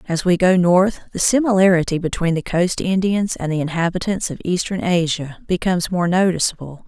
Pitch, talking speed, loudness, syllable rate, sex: 180 Hz, 165 wpm, -18 LUFS, 5.4 syllables/s, female